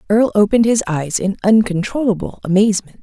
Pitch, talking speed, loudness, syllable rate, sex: 205 Hz, 140 wpm, -16 LUFS, 6.4 syllables/s, female